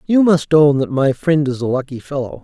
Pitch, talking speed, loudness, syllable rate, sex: 145 Hz, 245 wpm, -16 LUFS, 5.2 syllables/s, male